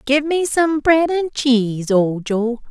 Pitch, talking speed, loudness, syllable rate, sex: 265 Hz, 155 wpm, -17 LUFS, 3.6 syllables/s, female